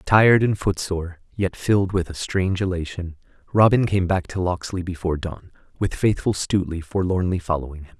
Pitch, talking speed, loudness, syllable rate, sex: 90 Hz, 165 wpm, -22 LUFS, 5.6 syllables/s, male